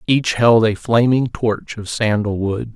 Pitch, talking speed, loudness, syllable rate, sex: 110 Hz, 175 wpm, -17 LUFS, 3.9 syllables/s, male